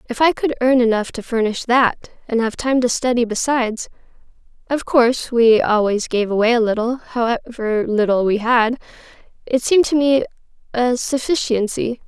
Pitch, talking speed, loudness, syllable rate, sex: 240 Hz, 150 wpm, -18 LUFS, 5.0 syllables/s, female